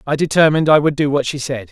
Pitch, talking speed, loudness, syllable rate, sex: 145 Hz, 280 wpm, -15 LUFS, 7.0 syllables/s, male